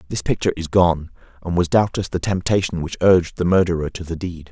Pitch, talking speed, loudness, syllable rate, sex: 85 Hz, 215 wpm, -20 LUFS, 6.1 syllables/s, male